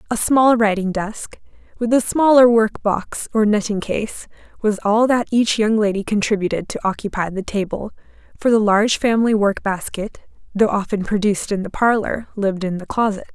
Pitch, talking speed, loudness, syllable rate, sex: 210 Hz, 175 wpm, -18 LUFS, 5.2 syllables/s, female